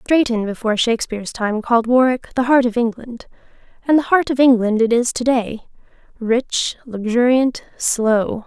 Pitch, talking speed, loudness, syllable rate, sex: 240 Hz, 140 wpm, -17 LUFS, 4.9 syllables/s, female